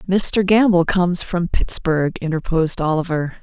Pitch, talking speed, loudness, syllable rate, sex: 175 Hz, 125 wpm, -18 LUFS, 4.8 syllables/s, female